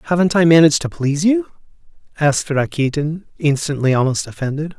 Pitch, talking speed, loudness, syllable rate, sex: 155 Hz, 140 wpm, -17 LUFS, 6.2 syllables/s, male